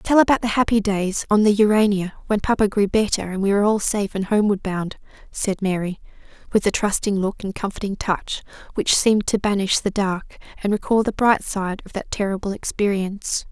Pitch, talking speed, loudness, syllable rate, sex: 205 Hz, 195 wpm, -21 LUFS, 5.6 syllables/s, female